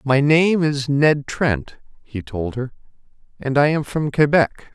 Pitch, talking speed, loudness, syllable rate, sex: 140 Hz, 165 wpm, -19 LUFS, 3.7 syllables/s, male